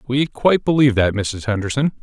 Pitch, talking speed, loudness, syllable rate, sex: 125 Hz, 180 wpm, -18 LUFS, 6.0 syllables/s, male